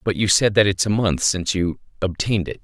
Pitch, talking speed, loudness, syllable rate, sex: 95 Hz, 250 wpm, -20 LUFS, 6.0 syllables/s, male